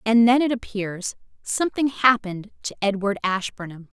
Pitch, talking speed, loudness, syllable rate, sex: 215 Hz, 135 wpm, -22 LUFS, 5.1 syllables/s, female